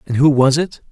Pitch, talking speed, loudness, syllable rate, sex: 140 Hz, 260 wpm, -15 LUFS, 5.6 syllables/s, male